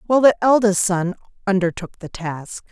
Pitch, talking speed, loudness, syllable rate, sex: 195 Hz, 155 wpm, -19 LUFS, 4.9 syllables/s, female